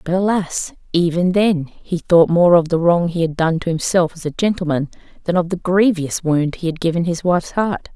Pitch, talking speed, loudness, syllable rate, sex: 175 Hz, 220 wpm, -17 LUFS, 5.1 syllables/s, female